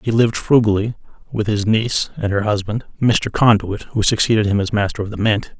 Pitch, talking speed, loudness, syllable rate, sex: 105 Hz, 205 wpm, -18 LUFS, 5.8 syllables/s, male